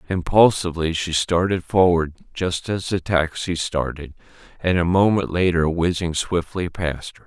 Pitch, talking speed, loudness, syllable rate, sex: 85 Hz, 140 wpm, -21 LUFS, 4.5 syllables/s, male